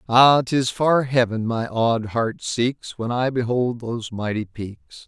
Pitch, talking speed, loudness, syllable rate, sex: 120 Hz, 165 wpm, -21 LUFS, 3.7 syllables/s, male